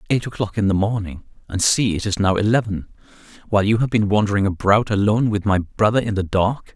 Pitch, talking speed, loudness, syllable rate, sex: 105 Hz, 215 wpm, -19 LUFS, 6.4 syllables/s, male